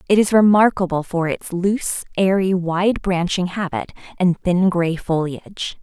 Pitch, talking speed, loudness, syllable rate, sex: 180 Hz, 145 wpm, -19 LUFS, 4.4 syllables/s, female